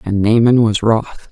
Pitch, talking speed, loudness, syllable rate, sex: 110 Hz, 185 wpm, -13 LUFS, 4.1 syllables/s, female